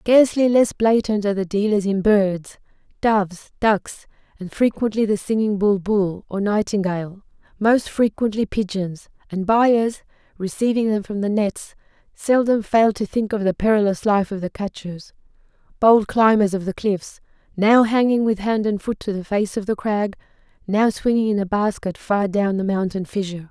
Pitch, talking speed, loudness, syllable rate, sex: 205 Hz, 165 wpm, -20 LUFS, 4.8 syllables/s, female